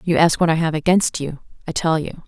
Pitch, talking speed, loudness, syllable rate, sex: 160 Hz, 265 wpm, -19 LUFS, 5.7 syllables/s, female